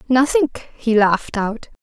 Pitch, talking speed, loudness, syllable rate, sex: 240 Hz, 130 wpm, -18 LUFS, 4.1 syllables/s, female